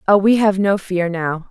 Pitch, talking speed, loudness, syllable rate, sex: 190 Hz, 240 wpm, -17 LUFS, 4.6 syllables/s, female